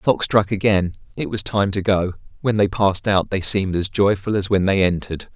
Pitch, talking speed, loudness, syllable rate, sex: 100 Hz, 235 wpm, -19 LUFS, 5.6 syllables/s, male